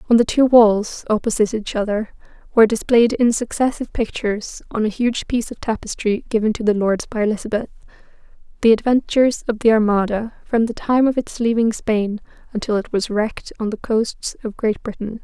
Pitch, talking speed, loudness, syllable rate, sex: 220 Hz, 180 wpm, -19 LUFS, 5.6 syllables/s, female